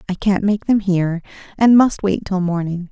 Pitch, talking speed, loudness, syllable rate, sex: 190 Hz, 205 wpm, -17 LUFS, 4.6 syllables/s, female